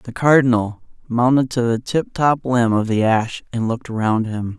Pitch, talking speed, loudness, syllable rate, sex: 120 Hz, 195 wpm, -18 LUFS, 4.7 syllables/s, male